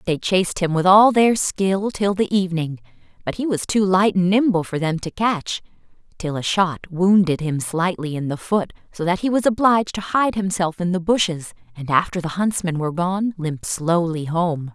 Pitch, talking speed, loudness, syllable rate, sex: 180 Hz, 205 wpm, -20 LUFS, 4.9 syllables/s, female